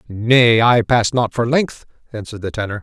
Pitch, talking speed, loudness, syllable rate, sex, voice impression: 115 Hz, 190 wpm, -16 LUFS, 5.0 syllables/s, male, masculine, adult-like, powerful, bright, hard, raspy, cool, mature, friendly, wild, lively, strict, intense, slightly sharp